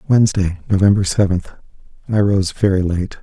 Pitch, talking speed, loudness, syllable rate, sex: 95 Hz, 130 wpm, -17 LUFS, 5.4 syllables/s, male